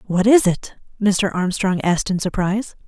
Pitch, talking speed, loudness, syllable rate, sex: 195 Hz, 165 wpm, -19 LUFS, 5.0 syllables/s, female